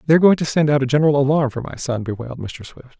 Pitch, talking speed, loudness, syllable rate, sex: 135 Hz, 300 wpm, -18 LUFS, 7.7 syllables/s, male